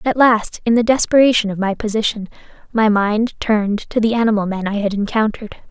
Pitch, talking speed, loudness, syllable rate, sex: 215 Hz, 190 wpm, -17 LUFS, 5.8 syllables/s, female